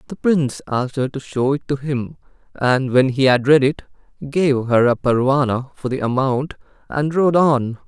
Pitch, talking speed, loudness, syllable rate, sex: 135 Hz, 190 wpm, -18 LUFS, 4.8 syllables/s, male